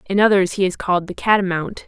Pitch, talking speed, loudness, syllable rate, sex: 190 Hz, 225 wpm, -18 LUFS, 6.5 syllables/s, female